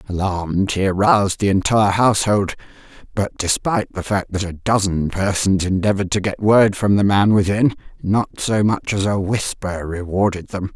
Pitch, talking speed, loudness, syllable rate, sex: 100 Hz, 165 wpm, -18 LUFS, 5.1 syllables/s, female